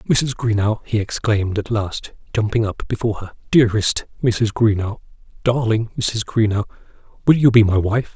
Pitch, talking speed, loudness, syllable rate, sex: 110 Hz, 155 wpm, -19 LUFS, 5.2 syllables/s, male